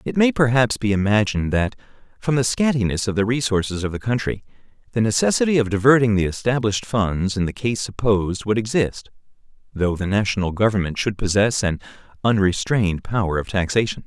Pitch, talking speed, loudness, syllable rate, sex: 110 Hz, 165 wpm, -20 LUFS, 5.9 syllables/s, male